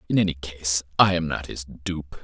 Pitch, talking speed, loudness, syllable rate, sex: 80 Hz, 215 wpm, -24 LUFS, 5.2 syllables/s, male